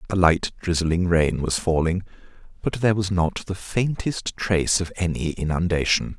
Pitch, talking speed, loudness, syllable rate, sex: 90 Hz, 155 wpm, -23 LUFS, 4.8 syllables/s, male